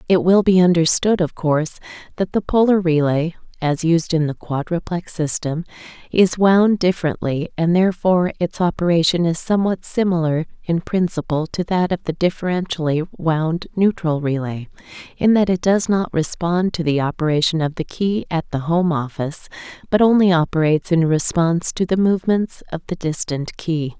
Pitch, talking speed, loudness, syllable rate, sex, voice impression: 170 Hz, 160 wpm, -19 LUFS, 5.2 syllables/s, female, feminine, adult-like, slightly clear, slightly cool, sincere, calm, elegant, slightly kind